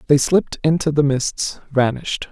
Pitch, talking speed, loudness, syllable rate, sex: 145 Hz, 155 wpm, -19 LUFS, 4.9 syllables/s, male